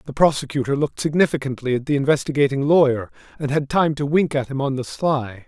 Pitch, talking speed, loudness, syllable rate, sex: 140 Hz, 195 wpm, -20 LUFS, 6.1 syllables/s, male